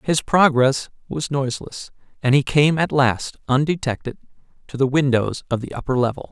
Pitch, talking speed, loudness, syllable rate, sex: 135 Hz, 160 wpm, -20 LUFS, 5.1 syllables/s, male